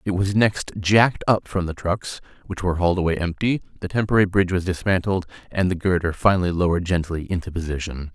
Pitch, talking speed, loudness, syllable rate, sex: 90 Hz, 190 wpm, -22 LUFS, 6.4 syllables/s, male